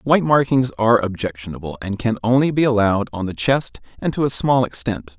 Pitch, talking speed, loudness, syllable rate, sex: 115 Hz, 195 wpm, -19 LUFS, 5.8 syllables/s, male